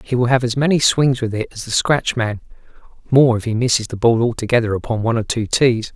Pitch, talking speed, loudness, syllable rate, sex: 120 Hz, 240 wpm, -17 LUFS, 6.1 syllables/s, male